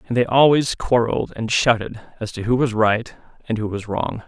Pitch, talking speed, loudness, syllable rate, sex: 115 Hz, 210 wpm, -19 LUFS, 5.0 syllables/s, male